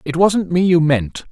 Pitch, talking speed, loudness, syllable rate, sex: 165 Hz, 230 wpm, -15 LUFS, 4.3 syllables/s, male